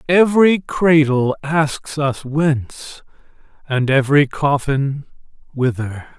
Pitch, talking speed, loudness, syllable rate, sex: 145 Hz, 85 wpm, -17 LUFS, 3.6 syllables/s, male